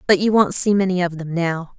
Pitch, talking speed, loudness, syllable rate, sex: 180 Hz, 270 wpm, -19 LUFS, 5.5 syllables/s, female